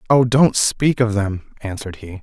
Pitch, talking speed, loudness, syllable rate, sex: 110 Hz, 190 wpm, -17 LUFS, 4.8 syllables/s, male